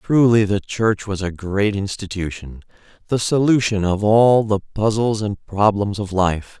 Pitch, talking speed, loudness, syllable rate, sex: 105 Hz, 145 wpm, -19 LUFS, 4.2 syllables/s, male